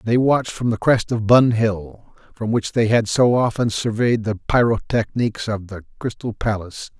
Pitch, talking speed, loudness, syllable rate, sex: 110 Hz, 180 wpm, -19 LUFS, 4.7 syllables/s, male